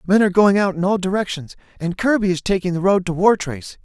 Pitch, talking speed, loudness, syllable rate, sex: 190 Hz, 235 wpm, -18 LUFS, 6.4 syllables/s, male